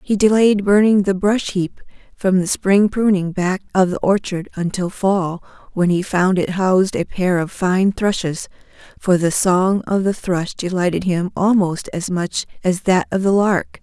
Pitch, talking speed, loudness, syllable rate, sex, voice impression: 190 Hz, 180 wpm, -18 LUFS, 4.3 syllables/s, female, feminine, adult-like, slightly relaxed, slightly dark, soft, raspy, intellectual, friendly, reassuring, lively, kind